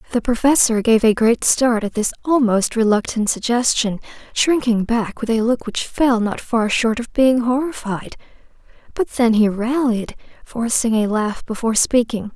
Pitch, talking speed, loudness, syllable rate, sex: 230 Hz, 160 wpm, -18 LUFS, 4.6 syllables/s, female